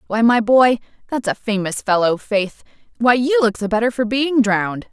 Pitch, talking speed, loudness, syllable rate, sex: 225 Hz, 170 wpm, -17 LUFS, 4.9 syllables/s, female